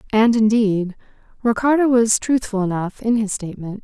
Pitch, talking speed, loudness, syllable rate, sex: 220 Hz, 140 wpm, -18 LUFS, 5.1 syllables/s, female